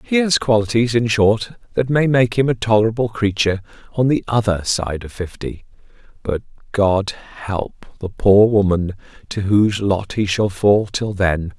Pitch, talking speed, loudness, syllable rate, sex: 105 Hz, 165 wpm, -18 LUFS, 4.5 syllables/s, male